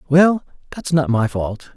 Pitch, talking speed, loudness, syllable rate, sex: 140 Hz, 170 wpm, -18 LUFS, 4.0 syllables/s, male